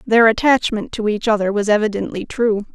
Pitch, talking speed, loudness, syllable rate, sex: 215 Hz, 175 wpm, -17 LUFS, 5.5 syllables/s, female